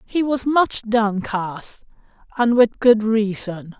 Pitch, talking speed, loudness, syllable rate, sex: 220 Hz, 125 wpm, -19 LUFS, 3.2 syllables/s, female